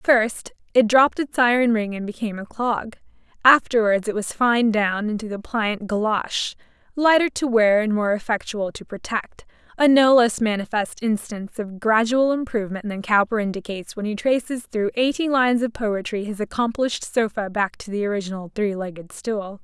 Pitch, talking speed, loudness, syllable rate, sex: 220 Hz, 165 wpm, -21 LUFS, 5.2 syllables/s, female